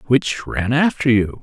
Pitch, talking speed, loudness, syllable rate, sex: 125 Hz, 170 wpm, -18 LUFS, 3.9 syllables/s, male